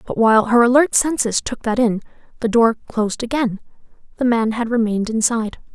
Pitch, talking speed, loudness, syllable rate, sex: 230 Hz, 165 wpm, -18 LUFS, 5.9 syllables/s, female